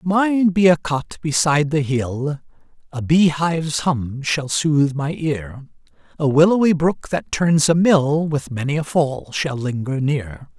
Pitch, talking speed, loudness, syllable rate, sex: 150 Hz, 165 wpm, -19 LUFS, 3.9 syllables/s, male